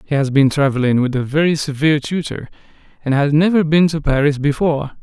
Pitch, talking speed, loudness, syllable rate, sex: 145 Hz, 190 wpm, -16 LUFS, 6.0 syllables/s, male